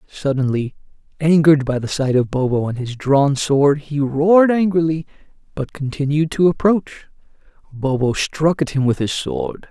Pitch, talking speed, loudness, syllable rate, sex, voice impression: 145 Hz, 155 wpm, -18 LUFS, 4.8 syllables/s, male, very masculine, slightly middle-aged, thick, tensed, powerful, bright, slightly soft, muffled, fluent, raspy, cool, intellectual, refreshing, slightly sincere, calm, mature, slightly friendly, reassuring, unique, slightly elegant, wild, slightly sweet, lively, slightly kind, slightly intense